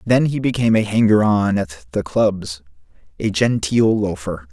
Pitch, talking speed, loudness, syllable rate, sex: 105 Hz, 160 wpm, -18 LUFS, 4.5 syllables/s, male